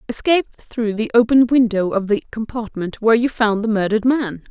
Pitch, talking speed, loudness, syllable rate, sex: 225 Hz, 185 wpm, -18 LUFS, 5.5 syllables/s, female